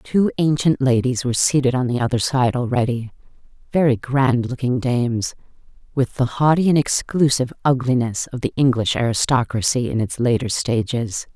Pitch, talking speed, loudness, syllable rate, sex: 125 Hz, 145 wpm, -19 LUFS, 5.2 syllables/s, female